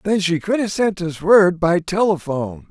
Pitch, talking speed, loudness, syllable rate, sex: 175 Hz, 200 wpm, -18 LUFS, 4.7 syllables/s, male